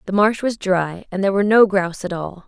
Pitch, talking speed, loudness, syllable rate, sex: 195 Hz, 265 wpm, -18 LUFS, 6.2 syllables/s, female